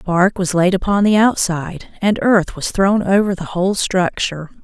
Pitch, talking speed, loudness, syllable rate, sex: 190 Hz, 180 wpm, -16 LUFS, 4.9 syllables/s, female